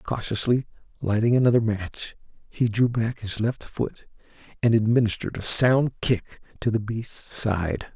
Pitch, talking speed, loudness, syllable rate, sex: 110 Hz, 145 wpm, -24 LUFS, 4.4 syllables/s, male